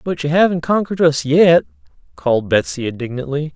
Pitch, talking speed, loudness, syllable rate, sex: 145 Hz, 150 wpm, -16 LUFS, 5.8 syllables/s, male